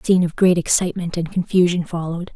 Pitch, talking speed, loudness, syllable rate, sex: 175 Hz, 205 wpm, -19 LUFS, 7.0 syllables/s, female